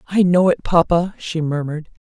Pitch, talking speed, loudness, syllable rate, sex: 170 Hz, 175 wpm, -18 LUFS, 5.1 syllables/s, female